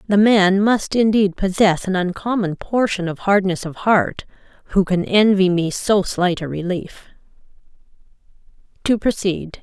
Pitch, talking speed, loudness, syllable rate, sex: 195 Hz, 130 wpm, -18 LUFS, 4.3 syllables/s, female